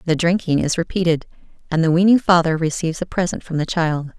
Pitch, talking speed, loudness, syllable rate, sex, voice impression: 170 Hz, 200 wpm, -19 LUFS, 6.1 syllables/s, female, very feminine, very adult-like, middle-aged, thin, tensed, slightly powerful, bright, slightly hard, very clear, fluent, cool, intellectual, slightly refreshing, sincere, calm, slightly friendly, slightly reassuring, slightly unique, elegant, slightly lively, slightly kind, slightly modest